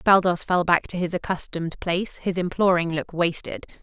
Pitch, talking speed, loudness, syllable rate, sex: 175 Hz, 170 wpm, -23 LUFS, 5.4 syllables/s, female